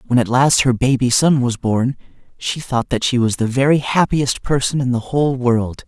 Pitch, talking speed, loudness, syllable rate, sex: 125 Hz, 215 wpm, -17 LUFS, 4.9 syllables/s, male